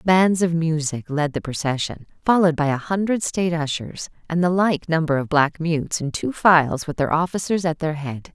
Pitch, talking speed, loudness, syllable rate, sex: 160 Hz, 200 wpm, -21 LUFS, 5.2 syllables/s, female